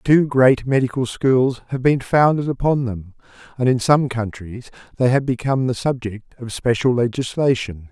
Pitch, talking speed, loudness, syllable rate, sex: 125 Hz, 160 wpm, -19 LUFS, 4.7 syllables/s, male